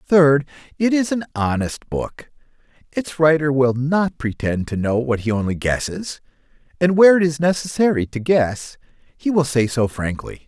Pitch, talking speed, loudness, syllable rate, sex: 145 Hz, 165 wpm, -19 LUFS, 4.7 syllables/s, male